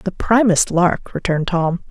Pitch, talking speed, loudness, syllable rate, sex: 180 Hz, 155 wpm, -17 LUFS, 4.4 syllables/s, female